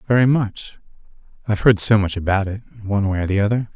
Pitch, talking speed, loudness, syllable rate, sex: 105 Hz, 190 wpm, -19 LUFS, 6.9 syllables/s, male